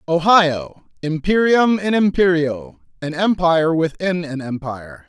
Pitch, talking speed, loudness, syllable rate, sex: 170 Hz, 95 wpm, -17 LUFS, 4.2 syllables/s, male